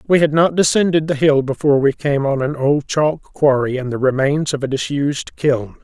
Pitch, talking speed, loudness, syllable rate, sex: 145 Hz, 215 wpm, -17 LUFS, 5.2 syllables/s, male